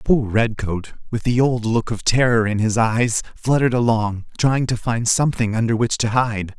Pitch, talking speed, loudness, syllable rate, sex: 115 Hz, 190 wpm, -19 LUFS, 4.8 syllables/s, male